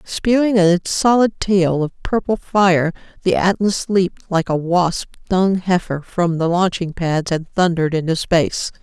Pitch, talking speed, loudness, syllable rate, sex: 180 Hz, 155 wpm, -17 LUFS, 4.2 syllables/s, female